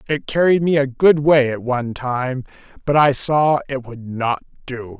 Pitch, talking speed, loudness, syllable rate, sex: 135 Hz, 190 wpm, -18 LUFS, 4.4 syllables/s, male